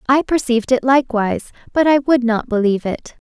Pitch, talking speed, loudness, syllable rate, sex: 245 Hz, 185 wpm, -17 LUFS, 6.2 syllables/s, female